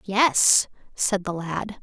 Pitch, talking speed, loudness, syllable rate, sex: 195 Hz, 130 wpm, -21 LUFS, 2.8 syllables/s, female